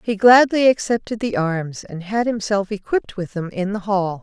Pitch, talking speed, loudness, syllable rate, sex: 205 Hz, 200 wpm, -19 LUFS, 4.8 syllables/s, female